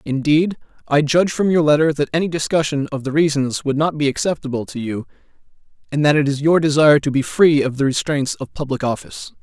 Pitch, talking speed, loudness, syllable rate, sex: 145 Hz, 210 wpm, -18 LUFS, 6.0 syllables/s, male